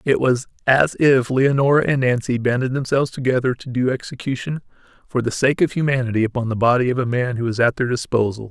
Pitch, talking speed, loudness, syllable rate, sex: 125 Hz, 205 wpm, -19 LUFS, 6.1 syllables/s, male